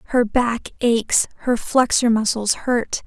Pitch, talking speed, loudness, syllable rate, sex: 235 Hz, 135 wpm, -19 LUFS, 4.1 syllables/s, female